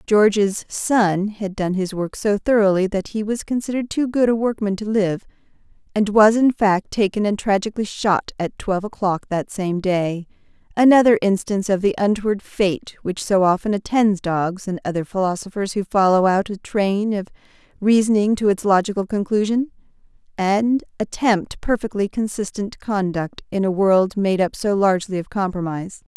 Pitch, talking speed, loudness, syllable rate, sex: 200 Hz, 160 wpm, -20 LUFS, 5.0 syllables/s, female